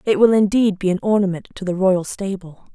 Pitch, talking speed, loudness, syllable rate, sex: 190 Hz, 220 wpm, -18 LUFS, 5.6 syllables/s, female